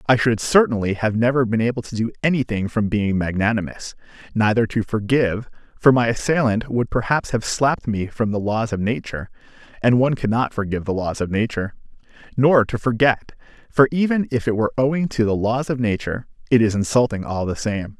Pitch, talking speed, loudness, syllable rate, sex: 115 Hz, 185 wpm, -20 LUFS, 5.8 syllables/s, male